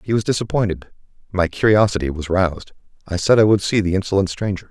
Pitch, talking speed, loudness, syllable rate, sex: 95 Hz, 190 wpm, -18 LUFS, 6.4 syllables/s, male